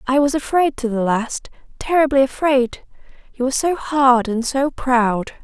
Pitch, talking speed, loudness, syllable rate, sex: 260 Hz, 155 wpm, -18 LUFS, 4.5 syllables/s, female